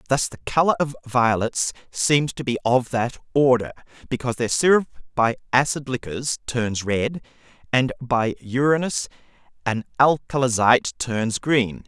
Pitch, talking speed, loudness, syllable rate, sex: 125 Hz, 130 wpm, -22 LUFS, 4.5 syllables/s, male